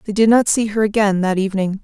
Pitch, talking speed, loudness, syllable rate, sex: 205 Hz, 260 wpm, -16 LUFS, 6.5 syllables/s, female